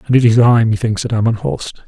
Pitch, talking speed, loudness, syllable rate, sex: 115 Hz, 255 wpm, -14 LUFS, 6.4 syllables/s, male